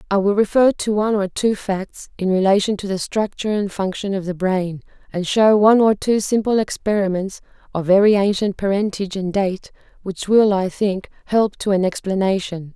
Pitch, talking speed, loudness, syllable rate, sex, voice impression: 200 Hz, 185 wpm, -19 LUFS, 5.2 syllables/s, female, feminine, slightly adult-like, slightly intellectual, calm, slightly reassuring, slightly kind